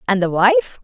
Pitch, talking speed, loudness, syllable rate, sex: 180 Hz, 215 wpm, -15 LUFS, 7.9 syllables/s, female